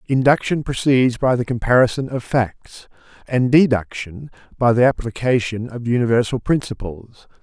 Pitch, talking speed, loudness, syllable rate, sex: 125 Hz, 120 wpm, -18 LUFS, 4.8 syllables/s, male